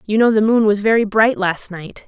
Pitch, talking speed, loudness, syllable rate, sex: 210 Hz, 260 wpm, -15 LUFS, 5.1 syllables/s, female